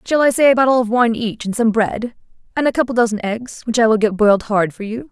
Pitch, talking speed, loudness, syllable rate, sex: 230 Hz, 295 wpm, -16 LUFS, 6.3 syllables/s, female